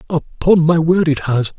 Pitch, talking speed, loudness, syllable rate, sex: 155 Hz, 190 wpm, -15 LUFS, 4.4 syllables/s, male